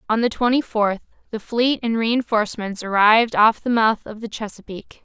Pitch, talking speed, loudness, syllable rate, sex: 220 Hz, 190 wpm, -19 LUFS, 5.5 syllables/s, female